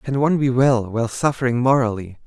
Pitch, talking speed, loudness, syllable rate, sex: 125 Hz, 185 wpm, -19 LUFS, 6.0 syllables/s, male